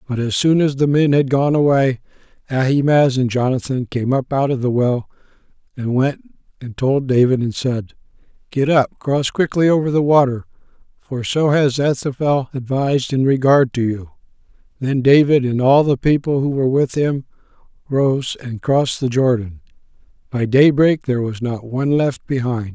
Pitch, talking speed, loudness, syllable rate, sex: 135 Hz, 170 wpm, -17 LUFS, 4.9 syllables/s, male